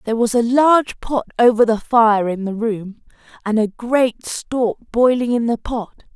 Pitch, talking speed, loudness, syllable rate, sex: 230 Hz, 185 wpm, -17 LUFS, 4.5 syllables/s, female